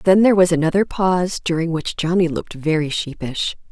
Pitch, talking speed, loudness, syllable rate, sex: 170 Hz, 180 wpm, -19 LUFS, 5.7 syllables/s, female